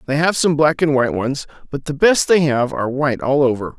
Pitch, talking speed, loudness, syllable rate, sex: 140 Hz, 255 wpm, -17 LUFS, 5.9 syllables/s, male